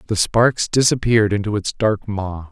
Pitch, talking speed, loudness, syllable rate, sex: 105 Hz, 165 wpm, -18 LUFS, 4.8 syllables/s, male